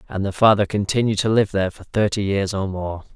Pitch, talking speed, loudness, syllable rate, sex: 100 Hz, 230 wpm, -20 LUFS, 5.9 syllables/s, male